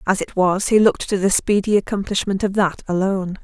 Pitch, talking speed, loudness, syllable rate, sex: 195 Hz, 210 wpm, -19 LUFS, 5.8 syllables/s, female